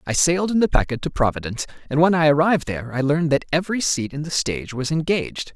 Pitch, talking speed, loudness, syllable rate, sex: 150 Hz, 235 wpm, -21 LUFS, 7.1 syllables/s, male